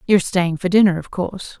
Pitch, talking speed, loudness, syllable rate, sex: 185 Hz, 225 wpm, -18 LUFS, 6.4 syllables/s, female